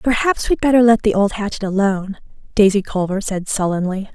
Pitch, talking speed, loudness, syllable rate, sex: 205 Hz, 175 wpm, -17 LUFS, 5.7 syllables/s, female